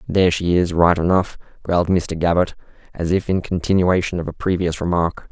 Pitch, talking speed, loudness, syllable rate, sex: 90 Hz, 180 wpm, -19 LUFS, 5.5 syllables/s, male